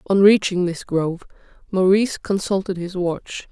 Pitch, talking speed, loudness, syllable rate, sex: 185 Hz, 135 wpm, -20 LUFS, 4.8 syllables/s, female